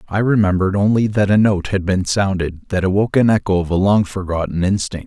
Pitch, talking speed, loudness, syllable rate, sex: 95 Hz, 215 wpm, -17 LUFS, 5.9 syllables/s, male